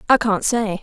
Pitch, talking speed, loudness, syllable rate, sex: 220 Hz, 215 wpm, -18 LUFS, 4.6 syllables/s, female